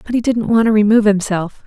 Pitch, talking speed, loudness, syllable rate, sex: 215 Hz, 250 wpm, -14 LUFS, 6.4 syllables/s, female